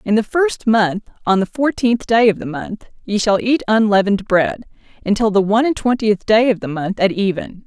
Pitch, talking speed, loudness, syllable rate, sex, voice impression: 210 Hz, 210 wpm, -16 LUFS, 5.2 syllables/s, female, feminine, adult-like, slightly powerful, clear, slightly intellectual, slightly sharp